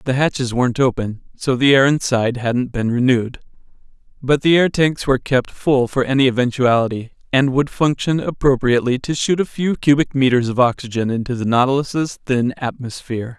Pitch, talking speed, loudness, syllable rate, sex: 130 Hz, 170 wpm, -17 LUFS, 5.5 syllables/s, male